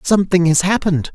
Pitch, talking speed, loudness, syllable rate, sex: 175 Hz, 155 wpm, -15 LUFS, 6.7 syllables/s, male